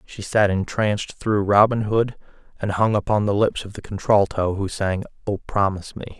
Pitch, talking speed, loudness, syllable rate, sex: 100 Hz, 185 wpm, -21 LUFS, 5.1 syllables/s, male